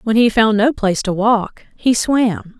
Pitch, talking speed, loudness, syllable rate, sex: 220 Hz, 210 wpm, -16 LUFS, 4.2 syllables/s, female